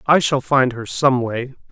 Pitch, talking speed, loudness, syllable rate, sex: 130 Hz, 210 wpm, -18 LUFS, 4.1 syllables/s, male